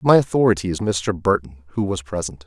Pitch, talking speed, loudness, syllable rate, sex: 95 Hz, 195 wpm, -21 LUFS, 5.9 syllables/s, male